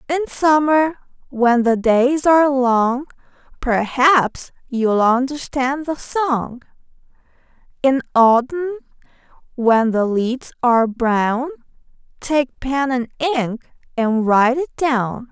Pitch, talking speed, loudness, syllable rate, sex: 260 Hz, 105 wpm, -17 LUFS, 3.3 syllables/s, female